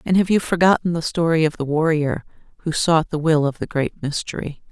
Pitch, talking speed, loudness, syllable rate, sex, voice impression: 160 Hz, 215 wpm, -20 LUFS, 5.6 syllables/s, female, feminine, very adult-like, slightly intellectual, calm, reassuring, elegant